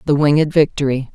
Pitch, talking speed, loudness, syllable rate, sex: 145 Hz, 155 wpm, -16 LUFS, 6.1 syllables/s, female